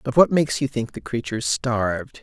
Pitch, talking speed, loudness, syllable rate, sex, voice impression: 125 Hz, 245 wpm, -22 LUFS, 6.1 syllables/s, male, very masculine, very adult-like, very middle-aged, very thick, slightly tensed, slightly powerful, slightly bright, hard, slightly muffled, fluent, slightly raspy, cool, intellectual, slightly refreshing, sincere, calm, slightly friendly, reassuring, slightly elegant, slightly sweet, lively, slightly strict, slightly modest